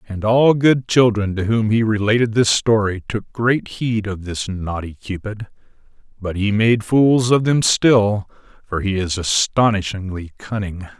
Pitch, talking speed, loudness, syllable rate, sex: 110 Hz, 160 wpm, -18 LUFS, 4.2 syllables/s, male